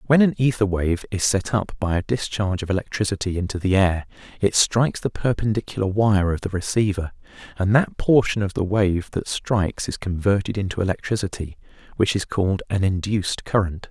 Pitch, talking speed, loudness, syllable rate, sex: 100 Hz, 175 wpm, -22 LUFS, 5.6 syllables/s, male